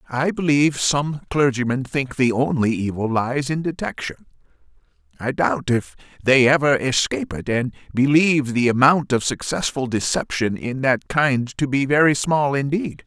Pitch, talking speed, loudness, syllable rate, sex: 135 Hz, 150 wpm, -20 LUFS, 4.6 syllables/s, male